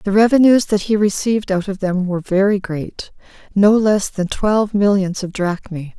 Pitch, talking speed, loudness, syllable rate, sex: 200 Hz, 180 wpm, -16 LUFS, 4.9 syllables/s, female